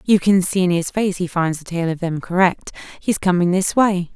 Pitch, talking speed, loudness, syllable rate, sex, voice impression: 180 Hz, 245 wpm, -18 LUFS, 5.1 syllables/s, female, very feminine, young, thin, tensed, slightly powerful, bright, slightly hard, clear, fluent, slightly raspy, cute, intellectual, very refreshing, sincere, calm, very friendly, reassuring, very unique, elegant, wild, sweet, very lively, slightly strict, intense, sharp, slightly light